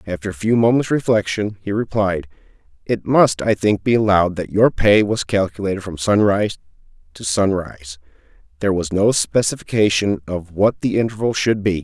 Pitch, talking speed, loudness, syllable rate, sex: 100 Hz, 160 wpm, -18 LUFS, 5.3 syllables/s, male